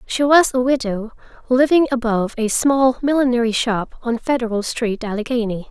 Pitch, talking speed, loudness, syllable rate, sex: 240 Hz, 145 wpm, -18 LUFS, 5.2 syllables/s, female